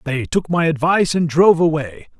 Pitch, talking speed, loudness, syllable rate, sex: 155 Hz, 190 wpm, -16 LUFS, 5.6 syllables/s, male